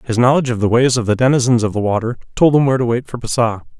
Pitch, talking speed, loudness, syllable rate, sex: 120 Hz, 285 wpm, -15 LUFS, 7.4 syllables/s, male